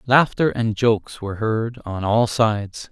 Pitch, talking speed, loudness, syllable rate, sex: 110 Hz, 165 wpm, -20 LUFS, 4.3 syllables/s, male